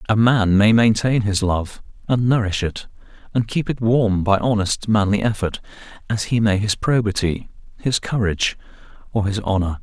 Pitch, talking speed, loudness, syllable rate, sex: 105 Hz, 165 wpm, -19 LUFS, 4.9 syllables/s, male